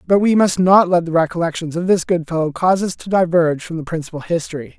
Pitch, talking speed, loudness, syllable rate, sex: 170 Hz, 240 wpm, -17 LUFS, 6.4 syllables/s, male